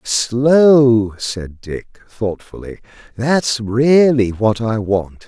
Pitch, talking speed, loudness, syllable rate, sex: 120 Hz, 100 wpm, -15 LUFS, 2.6 syllables/s, male